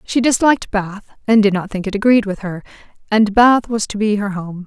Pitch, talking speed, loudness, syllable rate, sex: 210 Hz, 230 wpm, -16 LUFS, 5.3 syllables/s, female